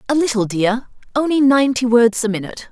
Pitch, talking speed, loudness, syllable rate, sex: 240 Hz, 175 wpm, -17 LUFS, 6.2 syllables/s, female